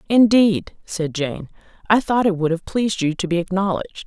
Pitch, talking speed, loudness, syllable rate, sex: 185 Hz, 190 wpm, -19 LUFS, 5.3 syllables/s, female